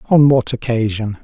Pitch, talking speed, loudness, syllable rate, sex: 120 Hz, 145 wpm, -15 LUFS, 5.0 syllables/s, male